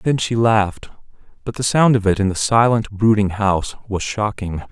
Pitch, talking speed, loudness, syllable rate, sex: 105 Hz, 190 wpm, -18 LUFS, 5.1 syllables/s, male